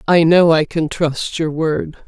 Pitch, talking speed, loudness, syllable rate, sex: 160 Hz, 200 wpm, -16 LUFS, 3.6 syllables/s, female